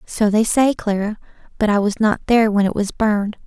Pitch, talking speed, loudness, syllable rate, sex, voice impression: 210 Hz, 225 wpm, -18 LUFS, 5.7 syllables/s, female, feminine, young, slightly weak, clear, slightly cute, refreshing, slightly sweet, slightly lively, kind, slightly modest